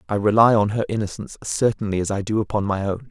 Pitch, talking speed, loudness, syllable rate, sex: 105 Hz, 250 wpm, -21 LUFS, 6.7 syllables/s, male